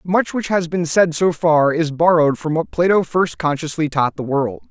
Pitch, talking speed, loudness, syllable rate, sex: 160 Hz, 215 wpm, -17 LUFS, 4.9 syllables/s, male